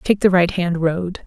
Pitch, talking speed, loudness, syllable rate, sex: 180 Hz, 190 wpm, -18 LUFS, 4.1 syllables/s, female